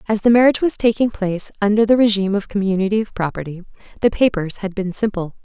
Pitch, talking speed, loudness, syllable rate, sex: 205 Hz, 200 wpm, -18 LUFS, 6.8 syllables/s, female